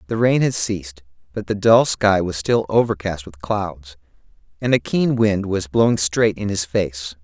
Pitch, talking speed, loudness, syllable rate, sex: 95 Hz, 190 wpm, -19 LUFS, 4.4 syllables/s, male